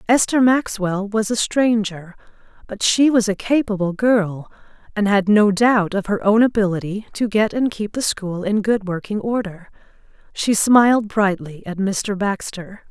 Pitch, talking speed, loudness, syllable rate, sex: 210 Hz, 165 wpm, -18 LUFS, 4.3 syllables/s, female